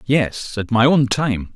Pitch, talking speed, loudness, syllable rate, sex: 120 Hz, 155 wpm, -18 LUFS, 3.5 syllables/s, male